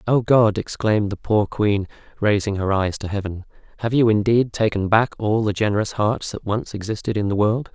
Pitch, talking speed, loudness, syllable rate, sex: 105 Hz, 200 wpm, -20 LUFS, 5.2 syllables/s, male